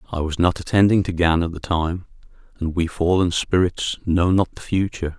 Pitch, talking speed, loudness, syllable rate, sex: 85 Hz, 195 wpm, -20 LUFS, 5.3 syllables/s, male